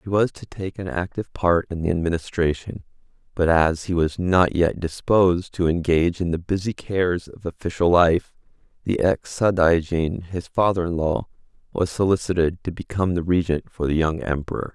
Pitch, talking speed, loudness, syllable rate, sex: 85 Hz, 175 wpm, -22 LUFS, 5.1 syllables/s, male